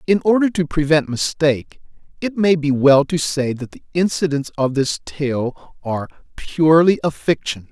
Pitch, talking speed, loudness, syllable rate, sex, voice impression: 150 Hz, 165 wpm, -18 LUFS, 4.7 syllables/s, male, masculine, middle-aged, tensed, slightly powerful, clear, raspy, cool, intellectual, slightly mature, friendly, wild, lively, strict, slightly sharp